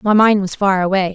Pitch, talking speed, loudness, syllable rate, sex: 195 Hz, 265 wpm, -15 LUFS, 5.7 syllables/s, female